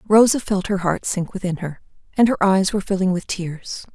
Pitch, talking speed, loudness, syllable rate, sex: 190 Hz, 215 wpm, -20 LUFS, 5.3 syllables/s, female